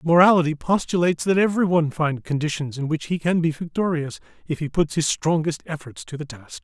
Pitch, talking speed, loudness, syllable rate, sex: 160 Hz, 190 wpm, -22 LUFS, 5.8 syllables/s, male